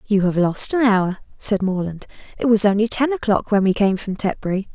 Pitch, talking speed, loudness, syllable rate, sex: 205 Hz, 215 wpm, -19 LUFS, 5.3 syllables/s, female